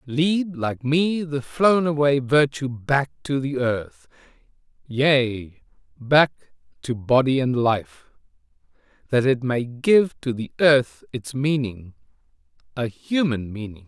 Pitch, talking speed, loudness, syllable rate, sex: 135 Hz, 120 wpm, -21 LUFS, 3.4 syllables/s, male